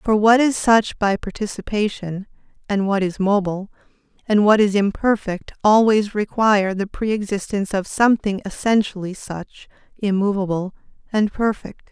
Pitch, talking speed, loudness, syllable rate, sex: 205 Hz, 130 wpm, -19 LUFS, 4.9 syllables/s, female